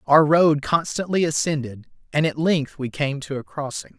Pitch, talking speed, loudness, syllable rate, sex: 150 Hz, 180 wpm, -22 LUFS, 4.8 syllables/s, male